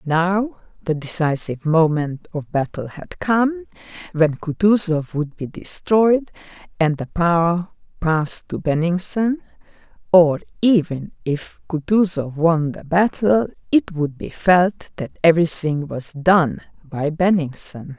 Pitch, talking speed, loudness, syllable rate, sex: 170 Hz, 120 wpm, -19 LUFS, 3.9 syllables/s, female